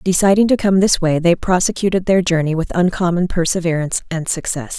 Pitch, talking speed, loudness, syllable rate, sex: 175 Hz, 175 wpm, -16 LUFS, 5.8 syllables/s, female